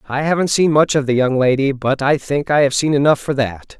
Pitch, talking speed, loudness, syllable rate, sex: 140 Hz, 270 wpm, -16 LUFS, 5.5 syllables/s, male